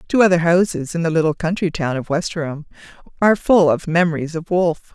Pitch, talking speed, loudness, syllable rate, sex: 170 Hz, 195 wpm, -18 LUFS, 6.1 syllables/s, female